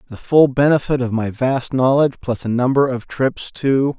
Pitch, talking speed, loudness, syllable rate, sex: 130 Hz, 195 wpm, -17 LUFS, 4.8 syllables/s, male